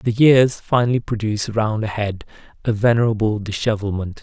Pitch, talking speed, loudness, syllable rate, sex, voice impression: 110 Hz, 140 wpm, -19 LUFS, 5.5 syllables/s, male, very masculine, adult-like, slightly thick, relaxed, weak, slightly dark, very soft, muffled, slightly halting, slightly raspy, cool, intellectual, slightly refreshing, very sincere, very calm, slightly friendly, slightly reassuring, very unique, elegant, slightly wild, very sweet, very kind, very modest